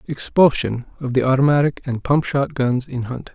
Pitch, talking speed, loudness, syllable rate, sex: 135 Hz, 160 wpm, -19 LUFS, 5.4 syllables/s, male